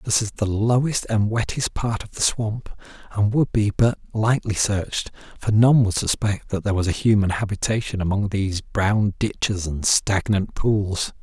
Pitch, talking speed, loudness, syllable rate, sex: 105 Hz, 175 wpm, -21 LUFS, 4.6 syllables/s, male